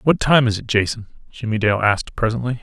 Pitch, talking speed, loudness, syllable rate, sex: 115 Hz, 205 wpm, -18 LUFS, 6.0 syllables/s, male